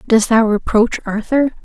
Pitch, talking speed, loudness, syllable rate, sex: 230 Hz, 145 wpm, -15 LUFS, 4.4 syllables/s, female